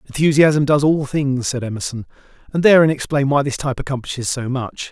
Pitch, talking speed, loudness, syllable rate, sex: 140 Hz, 185 wpm, -17 LUFS, 6.0 syllables/s, male